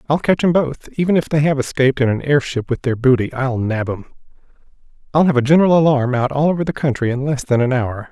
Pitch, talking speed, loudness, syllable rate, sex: 140 Hz, 245 wpm, -17 LUFS, 6.3 syllables/s, male